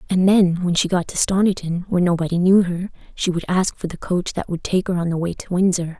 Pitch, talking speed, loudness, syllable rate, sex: 180 Hz, 260 wpm, -20 LUFS, 5.8 syllables/s, female